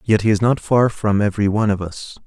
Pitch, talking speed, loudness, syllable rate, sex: 105 Hz, 265 wpm, -18 LUFS, 6.3 syllables/s, male